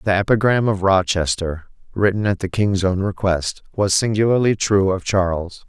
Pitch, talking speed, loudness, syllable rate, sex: 95 Hz, 160 wpm, -19 LUFS, 4.8 syllables/s, male